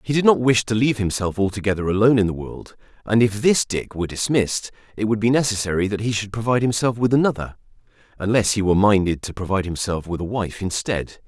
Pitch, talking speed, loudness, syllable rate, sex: 105 Hz, 210 wpm, -20 LUFS, 6.5 syllables/s, male